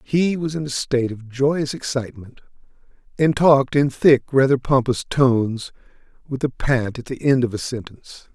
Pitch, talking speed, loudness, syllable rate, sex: 130 Hz, 175 wpm, -20 LUFS, 5.0 syllables/s, male